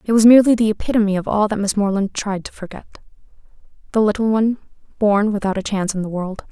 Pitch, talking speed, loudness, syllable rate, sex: 205 Hz, 205 wpm, -18 LUFS, 6.9 syllables/s, female